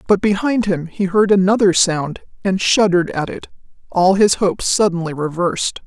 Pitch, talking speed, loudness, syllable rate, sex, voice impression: 190 Hz, 165 wpm, -16 LUFS, 5.1 syllables/s, female, feminine, slightly gender-neutral, adult-like, relaxed, soft, muffled, raspy, intellectual, friendly, reassuring, lively